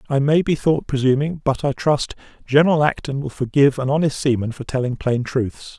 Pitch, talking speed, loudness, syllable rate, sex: 140 Hz, 195 wpm, -19 LUFS, 5.5 syllables/s, male